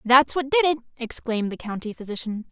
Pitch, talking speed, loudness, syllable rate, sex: 245 Hz, 190 wpm, -24 LUFS, 5.8 syllables/s, female